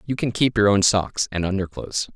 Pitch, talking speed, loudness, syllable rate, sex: 100 Hz, 220 wpm, -21 LUFS, 5.6 syllables/s, male